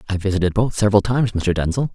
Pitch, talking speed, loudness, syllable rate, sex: 100 Hz, 215 wpm, -19 LUFS, 7.9 syllables/s, male